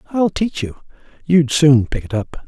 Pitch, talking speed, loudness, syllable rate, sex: 155 Hz, 170 wpm, -17 LUFS, 4.4 syllables/s, male